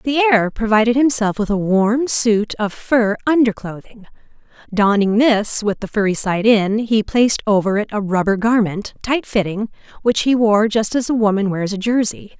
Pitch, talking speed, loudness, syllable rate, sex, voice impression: 215 Hz, 185 wpm, -17 LUFS, 4.7 syllables/s, female, very feminine, adult-like, slightly middle-aged, thin, tensed, slightly powerful, bright, slightly hard, clear, very fluent, slightly cute, cool, intellectual, very refreshing, sincere, slightly calm, slightly friendly, slightly reassuring, unique, slightly elegant, sweet, very lively, strict, intense, sharp, slightly light